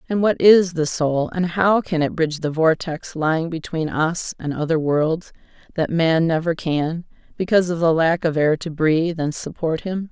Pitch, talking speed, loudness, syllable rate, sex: 165 Hz, 195 wpm, -20 LUFS, 4.7 syllables/s, female